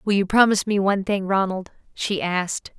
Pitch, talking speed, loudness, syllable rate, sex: 195 Hz, 195 wpm, -21 LUFS, 5.7 syllables/s, female